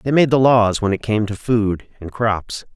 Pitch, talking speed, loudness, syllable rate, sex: 110 Hz, 240 wpm, -18 LUFS, 4.3 syllables/s, male